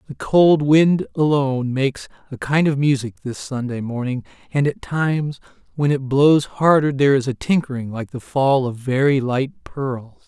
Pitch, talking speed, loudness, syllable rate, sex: 135 Hz, 175 wpm, -19 LUFS, 4.5 syllables/s, male